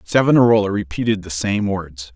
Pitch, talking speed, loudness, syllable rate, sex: 100 Hz, 140 wpm, -18 LUFS, 5.4 syllables/s, male